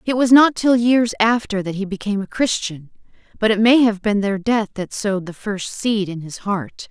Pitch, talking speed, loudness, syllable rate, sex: 210 Hz, 225 wpm, -18 LUFS, 5.0 syllables/s, female